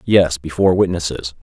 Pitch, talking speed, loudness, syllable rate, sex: 85 Hz, 120 wpm, -17 LUFS, 5.5 syllables/s, male